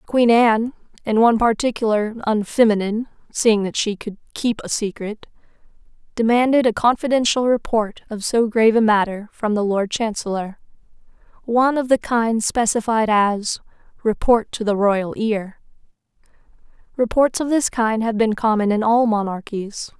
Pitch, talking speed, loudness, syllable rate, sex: 220 Hz, 140 wpm, -19 LUFS, 4.9 syllables/s, female